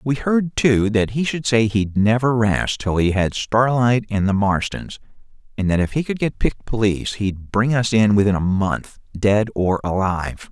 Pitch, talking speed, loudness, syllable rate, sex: 110 Hz, 200 wpm, -19 LUFS, 4.6 syllables/s, male